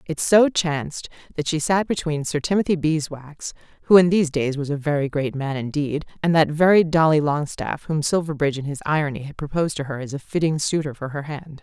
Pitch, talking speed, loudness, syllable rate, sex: 150 Hz, 210 wpm, -21 LUFS, 5.7 syllables/s, female